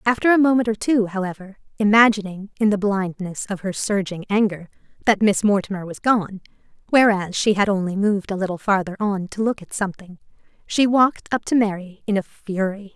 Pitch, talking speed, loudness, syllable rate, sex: 205 Hz, 185 wpm, -20 LUFS, 5.6 syllables/s, female